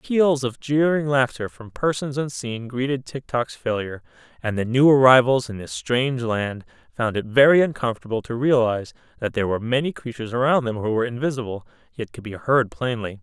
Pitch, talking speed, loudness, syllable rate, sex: 125 Hz, 180 wpm, -22 LUFS, 5.7 syllables/s, male